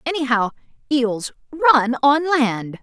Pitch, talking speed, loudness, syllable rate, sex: 265 Hz, 105 wpm, -18 LUFS, 3.7 syllables/s, female